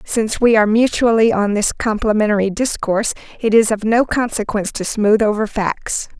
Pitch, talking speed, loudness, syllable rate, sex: 215 Hz, 165 wpm, -16 LUFS, 5.4 syllables/s, female